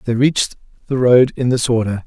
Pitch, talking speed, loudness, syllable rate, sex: 120 Hz, 205 wpm, -16 LUFS, 5.8 syllables/s, male